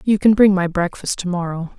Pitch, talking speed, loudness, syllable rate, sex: 185 Hz, 235 wpm, -17 LUFS, 5.5 syllables/s, female